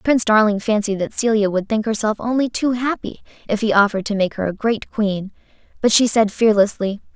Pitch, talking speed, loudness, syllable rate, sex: 215 Hz, 200 wpm, -18 LUFS, 5.7 syllables/s, female